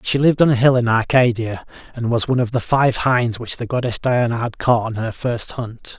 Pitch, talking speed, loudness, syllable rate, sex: 120 Hz, 240 wpm, -18 LUFS, 5.4 syllables/s, male